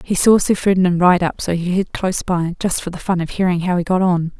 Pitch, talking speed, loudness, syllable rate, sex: 180 Hz, 285 wpm, -17 LUFS, 5.9 syllables/s, female